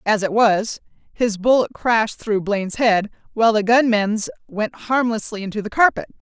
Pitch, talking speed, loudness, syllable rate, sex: 220 Hz, 160 wpm, -19 LUFS, 4.9 syllables/s, female